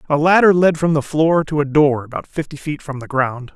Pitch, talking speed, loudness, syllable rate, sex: 150 Hz, 255 wpm, -17 LUFS, 5.3 syllables/s, male